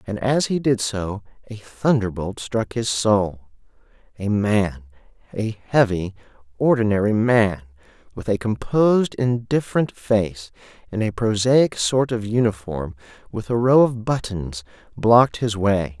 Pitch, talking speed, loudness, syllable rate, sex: 110 Hz, 130 wpm, -20 LUFS, 4.1 syllables/s, male